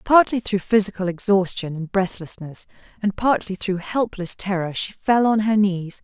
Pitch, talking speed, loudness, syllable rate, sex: 195 Hz, 160 wpm, -21 LUFS, 4.7 syllables/s, female